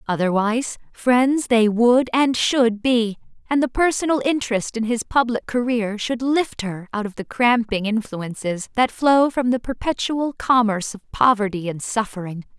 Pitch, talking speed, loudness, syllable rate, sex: 230 Hz, 155 wpm, -20 LUFS, 4.5 syllables/s, female